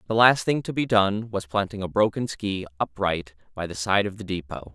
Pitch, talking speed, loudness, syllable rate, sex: 100 Hz, 230 wpm, -24 LUFS, 5.2 syllables/s, male